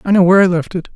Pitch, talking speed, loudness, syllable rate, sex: 185 Hz, 375 wpm, -12 LUFS, 8.3 syllables/s, male